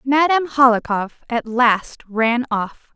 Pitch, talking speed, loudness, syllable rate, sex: 245 Hz, 120 wpm, -18 LUFS, 3.6 syllables/s, female